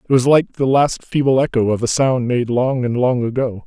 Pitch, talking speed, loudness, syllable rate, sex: 125 Hz, 245 wpm, -17 LUFS, 5.0 syllables/s, male